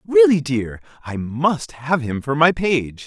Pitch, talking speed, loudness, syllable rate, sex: 135 Hz, 175 wpm, -19 LUFS, 3.7 syllables/s, male